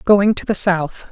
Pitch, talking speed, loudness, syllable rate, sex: 190 Hz, 215 wpm, -16 LUFS, 4.1 syllables/s, female